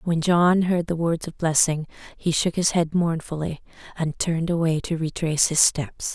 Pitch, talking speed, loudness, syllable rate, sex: 165 Hz, 185 wpm, -22 LUFS, 4.8 syllables/s, female